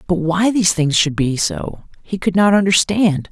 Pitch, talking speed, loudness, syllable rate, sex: 175 Hz, 200 wpm, -16 LUFS, 4.6 syllables/s, male